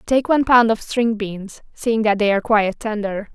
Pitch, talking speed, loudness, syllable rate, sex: 220 Hz, 215 wpm, -18 LUFS, 5.2 syllables/s, female